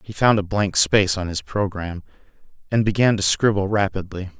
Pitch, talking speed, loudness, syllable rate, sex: 95 Hz, 175 wpm, -20 LUFS, 5.6 syllables/s, male